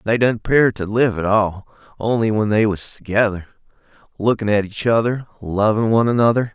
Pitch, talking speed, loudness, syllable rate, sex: 110 Hz, 175 wpm, -18 LUFS, 5.3 syllables/s, male